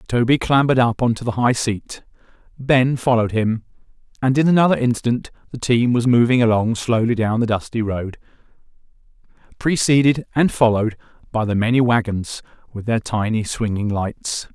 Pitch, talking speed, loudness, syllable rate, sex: 120 Hz, 155 wpm, -19 LUFS, 5.2 syllables/s, male